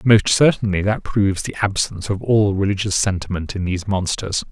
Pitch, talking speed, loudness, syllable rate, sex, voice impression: 100 Hz, 175 wpm, -19 LUFS, 5.5 syllables/s, male, very masculine, very middle-aged, very thick, slightly tensed, powerful, very bright, soft, clear, fluent, slightly raspy, cool, intellectual, refreshing, very sincere, very calm, very mature, friendly, reassuring, very unique, elegant, wild, slightly sweet, lively, kind